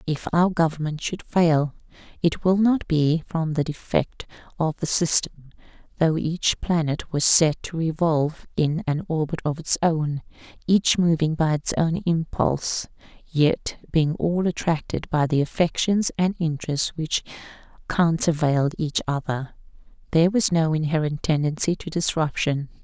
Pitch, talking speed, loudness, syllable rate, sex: 160 Hz, 140 wpm, -23 LUFS, 4.4 syllables/s, female